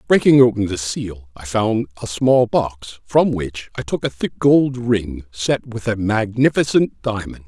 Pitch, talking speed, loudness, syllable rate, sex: 110 Hz, 175 wpm, -18 LUFS, 4.1 syllables/s, male